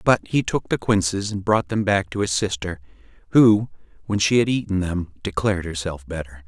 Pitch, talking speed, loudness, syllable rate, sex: 95 Hz, 195 wpm, -21 LUFS, 5.3 syllables/s, male